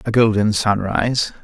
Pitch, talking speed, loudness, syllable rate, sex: 105 Hz, 125 wpm, -17 LUFS, 4.8 syllables/s, male